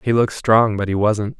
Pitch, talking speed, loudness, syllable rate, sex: 110 Hz, 260 wpm, -17 LUFS, 5.4 syllables/s, male